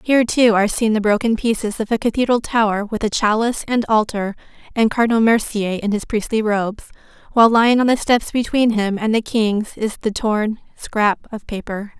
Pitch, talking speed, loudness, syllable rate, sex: 220 Hz, 195 wpm, -18 LUFS, 5.4 syllables/s, female